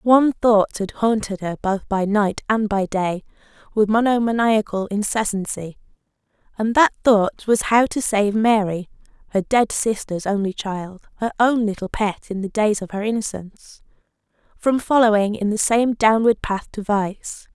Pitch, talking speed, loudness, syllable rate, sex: 210 Hz, 155 wpm, -20 LUFS, 3.8 syllables/s, female